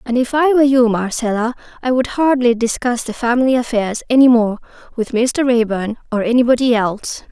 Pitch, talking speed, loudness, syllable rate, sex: 240 Hz, 165 wpm, -16 LUFS, 5.6 syllables/s, female